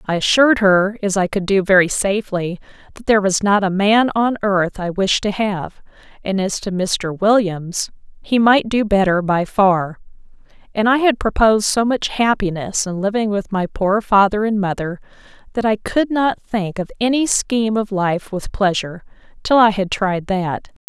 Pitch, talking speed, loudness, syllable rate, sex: 205 Hz, 185 wpm, -17 LUFS, 4.7 syllables/s, female